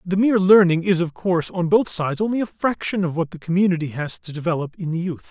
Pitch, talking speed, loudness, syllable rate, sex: 175 Hz, 250 wpm, -20 LUFS, 6.4 syllables/s, male